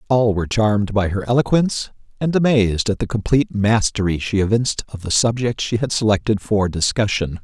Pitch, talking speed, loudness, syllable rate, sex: 110 Hz, 180 wpm, -19 LUFS, 5.9 syllables/s, male